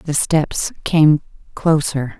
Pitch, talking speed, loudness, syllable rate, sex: 150 Hz, 110 wpm, -17 LUFS, 2.9 syllables/s, female